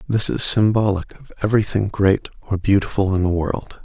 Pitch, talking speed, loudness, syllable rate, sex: 100 Hz, 170 wpm, -19 LUFS, 5.2 syllables/s, male